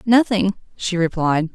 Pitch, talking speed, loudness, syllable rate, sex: 190 Hz, 115 wpm, -19 LUFS, 4.1 syllables/s, female